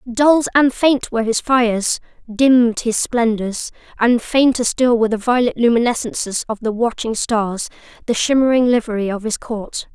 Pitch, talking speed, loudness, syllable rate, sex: 235 Hz, 155 wpm, -17 LUFS, 4.9 syllables/s, female